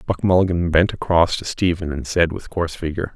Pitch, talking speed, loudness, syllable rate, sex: 85 Hz, 210 wpm, -20 LUFS, 5.7 syllables/s, male